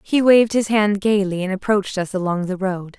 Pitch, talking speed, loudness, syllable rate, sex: 200 Hz, 220 wpm, -19 LUFS, 5.5 syllables/s, female